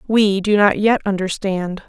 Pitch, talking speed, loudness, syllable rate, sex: 200 Hz, 160 wpm, -17 LUFS, 4.3 syllables/s, female